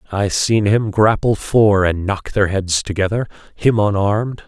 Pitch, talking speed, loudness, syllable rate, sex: 100 Hz, 145 wpm, -17 LUFS, 4.3 syllables/s, male